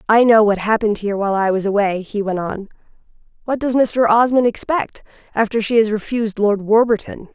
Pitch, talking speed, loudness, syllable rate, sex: 215 Hz, 190 wpm, -17 LUFS, 5.7 syllables/s, female